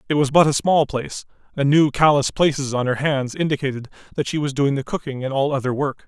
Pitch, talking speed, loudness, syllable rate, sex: 140 Hz, 235 wpm, -20 LUFS, 6.0 syllables/s, male